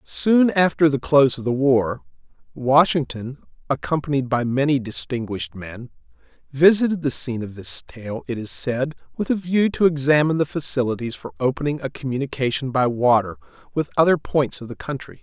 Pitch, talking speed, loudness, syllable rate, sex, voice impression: 135 Hz, 160 wpm, -21 LUFS, 5.4 syllables/s, male, very masculine, very adult-like, very middle-aged, thick, slightly tensed, slightly powerful, bright, slightly soft, clear, fluent, slightly raspy, cool, intellectual, slightly refreshing, sincere, very calm, mature, friendly, reassuring, very unique, slightly elegant, wild, slightly sweet, lively, kind, slightly light